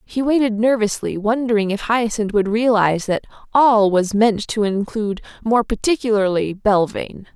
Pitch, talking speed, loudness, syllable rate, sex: 215 Hz, 140 wpm, -18 LUFS, 5.0 syllables/s, female